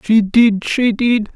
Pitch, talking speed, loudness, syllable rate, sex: 220 Hz, 135 wpm, -14 LUFS, 3.3 syllables/s, male